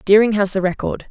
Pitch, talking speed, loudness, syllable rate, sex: 200 Hz, 215 wpm, -17 LUFS, 5.9 syllables/s, female